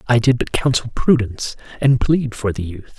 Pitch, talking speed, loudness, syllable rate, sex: 120 Hz, 200 wpm, -18 LUFS, 5.1 syllables/s, male